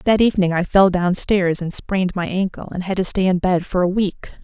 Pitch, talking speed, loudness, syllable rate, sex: 185 Hz, 245 wpm, -19 LUFS, 5.5 syllables/s, female